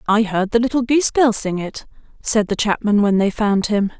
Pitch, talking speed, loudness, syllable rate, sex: 215 Hz, 225 wpm, -18 LUFS, 5.2 syllables/s, female